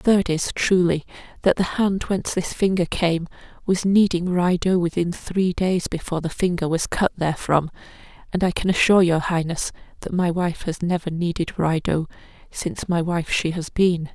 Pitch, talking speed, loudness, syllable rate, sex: 175 Hz, 185 wpm, -22 LUFS, 5.0 syllables/s, female